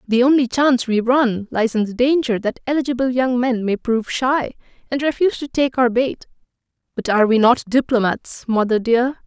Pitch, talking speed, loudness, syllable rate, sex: 245 Hz, 190 wpm, -18 LUFS, 5.3 syllables/s, female